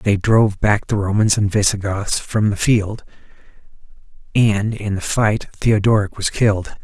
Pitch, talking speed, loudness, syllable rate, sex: 105 Hz, 150 wpm, -18 LUFS, 4.4 syllables/s, male